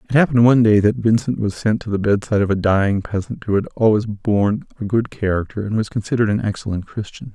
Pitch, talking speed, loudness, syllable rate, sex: 105 Hz, 230 wpm, -18 LUFS, 6.6 syllables/s, male